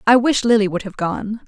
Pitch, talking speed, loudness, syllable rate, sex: 215 Hz, 245 wpm, -18 LUFS, 4.6 syllables/s, female